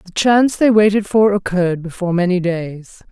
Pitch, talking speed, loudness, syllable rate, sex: 190 Hz, 175 wpm, -15 LUFS, 5.5 syllables/s, female